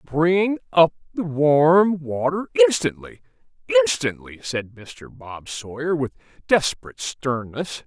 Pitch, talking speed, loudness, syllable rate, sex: 155 Hz, 100 wpm, -21 LUFS, 3.7 syllables/s, male